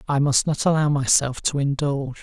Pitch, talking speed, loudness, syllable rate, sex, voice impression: 140 Hz, 190 wpm, -21 LUFS, 5.4 syllables/s, male, slightly feminine, adult-like, dark, calm, slightly unique